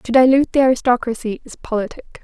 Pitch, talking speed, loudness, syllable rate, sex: 245 Hz, 160 wpm, -17 LUFS, 6.5 syllables/s, female